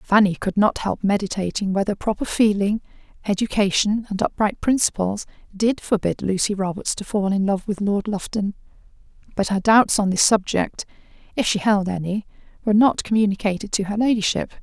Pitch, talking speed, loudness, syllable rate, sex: 205 Hz, 160 wpm, -21 LUFS, 5.4 syllables/s, female